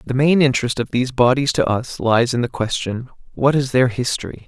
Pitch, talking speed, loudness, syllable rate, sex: 125 Hz, 215 wpm, -18 LUFS, 5.6 syllables/s, male